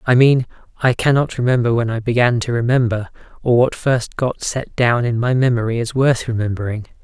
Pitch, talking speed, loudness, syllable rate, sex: 120 Hz, 190 wpm, -17 LUFS, 5.4 syllables/s, male